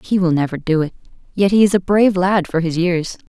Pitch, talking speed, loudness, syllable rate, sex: 180 Hz, 255 wpm, -16 LUFS, 5.9 syllables/s, female